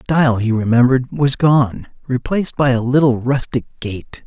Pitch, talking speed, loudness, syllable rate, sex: 130 Hz, 170 wpm, -16 LUFS, 5.1 syllables/s, male